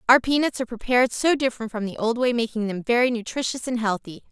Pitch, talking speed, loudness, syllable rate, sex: 235 Hz, 225 wpm, -23 LUFS, 6.7 syllables/s, female